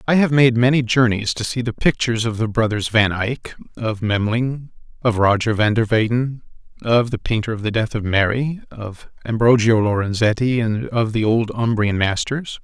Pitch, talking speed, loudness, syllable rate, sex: 115 Hz, 180 wpm, -19 LUFS, 4.9 syllables/s, male